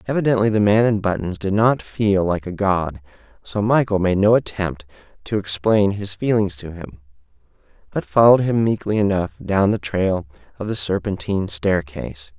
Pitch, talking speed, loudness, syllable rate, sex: 95 Hz, 165 wpm, -19 LUFS, 5.0 syllables/s, male